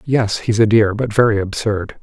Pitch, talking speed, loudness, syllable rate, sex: 110 Hz, 205 wpm, -16 LUFS, 4.7 syllables/s, male